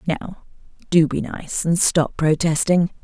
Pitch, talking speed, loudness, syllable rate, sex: 165 Hz, 140 wpm, -19 LUFS, 4.4 syllables/s, female